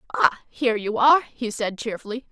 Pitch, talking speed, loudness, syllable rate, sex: 235 Hz, 180 wpm, -22 LUFS, 6.2 syllables/s, female